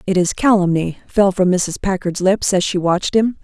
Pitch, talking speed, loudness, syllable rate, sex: 190 Hz, 210 wpm, -17 LUFS, 5.1 syllables/s, female